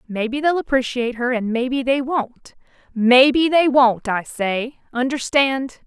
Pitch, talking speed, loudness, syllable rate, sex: 255 Hz, 145 wpm, -18 LUFS, 4.2 syllables/s, female